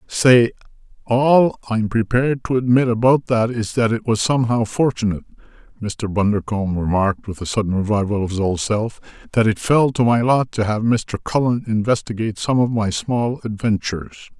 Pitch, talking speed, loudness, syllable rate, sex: 115 Hz, 170 wpm, -19 LUFS, 5.3 syllables/s, male